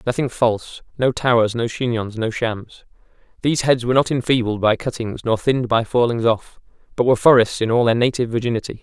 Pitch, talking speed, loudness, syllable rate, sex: 120 Hz, 190 wpm, -19 LUFS, 6.0 syllables/s, male